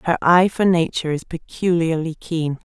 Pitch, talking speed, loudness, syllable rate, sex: 165 Hz, 155 wpm, -19 LUFS, 5.0 syllables/s, female